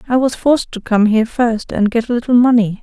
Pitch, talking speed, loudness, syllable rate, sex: 235 Hz, 255 wpm, -15 LUFS, 6.0 syllables/s, female